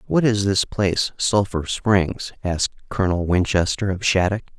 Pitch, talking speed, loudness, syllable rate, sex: 95 Hz, 145 wpm, -21 LUFS, 4.8 syllables/s, male